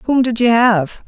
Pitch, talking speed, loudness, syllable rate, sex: 230 Hz, 225 wpm, -14 LUFS, 3.9 syllables/s, female